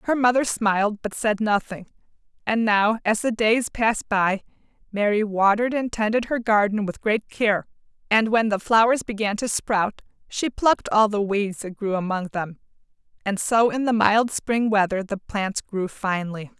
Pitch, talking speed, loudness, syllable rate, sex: 210 Hz, 175 wpm, -22 LUFS, 4.7 syllables/s, female